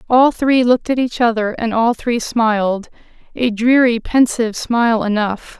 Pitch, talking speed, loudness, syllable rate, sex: 230 Hz, 150 wpm, -16 LUFS, 4.6 syllables/s, female